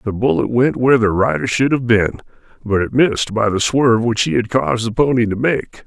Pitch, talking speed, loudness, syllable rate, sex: 115 Hz, 235 wpm, -16 LUFS, 5.8 syllables/s, male